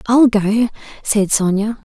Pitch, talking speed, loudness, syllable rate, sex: 215 Hz, 125 wpm, -16 LUFS, 3.7 syllables/s, female